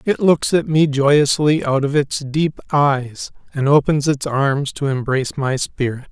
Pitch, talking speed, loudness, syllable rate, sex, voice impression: 140 Hz, 175 wpm, -17 LUFS, 4.1 syllables/s, male, masculine, middle-aged, bright, halting, calm, friendly, slightly wild, kind, slightly modest